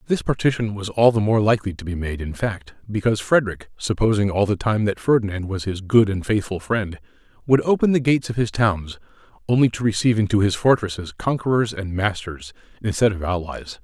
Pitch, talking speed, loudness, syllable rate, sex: 105 Hz, 195 wpm, -21 LUFS, 5.8 syllables/s, male